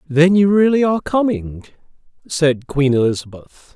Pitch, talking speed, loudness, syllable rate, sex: 160 Hz, 130 wpm, -16 LUFS, 4.7 syllables/s, male